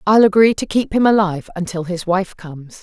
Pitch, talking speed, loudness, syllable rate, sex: 190 Hz, 215 wpm, -16 LUFS, 5.7 syllables/s, female